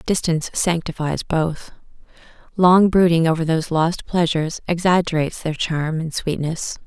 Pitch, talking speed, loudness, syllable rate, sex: 165 Hz, 120 wpm, -19 LUFS, 4.8 syllables/s, female